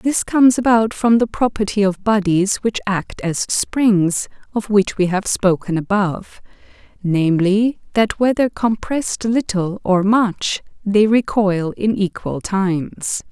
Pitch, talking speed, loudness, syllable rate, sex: 205 Hz, 135 wpm, -17 LUFS, 4.0 syllables/s, female